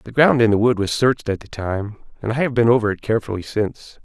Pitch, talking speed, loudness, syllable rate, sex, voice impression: 110 Hz, 265 wpm, -19 LUFS, 6.4 syllables/s, male, very masculine, middle-aged, thick, slightly tensed, slightly weak, dark, slightly soft, slightly muffled, fluent, slightly raspy, slightly cool, very intellectual, slightly refreshing, sincere, very calm, very mature, slightly friendly, slightly reassuring, very unique, elegant, wild, slightly sweet, lively, intense, sharp